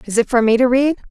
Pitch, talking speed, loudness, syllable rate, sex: 245 Hz, 325 wpm, -15 LUFS, 7.0 syllables/s, female